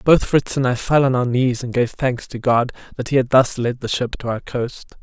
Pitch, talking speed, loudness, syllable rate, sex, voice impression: 125 Hz, 275 wpm, -19 LUFS, 5.0 syllables/s, male, masculine, adult-like, fluent, cool, slightly intellectual, slightly refreshing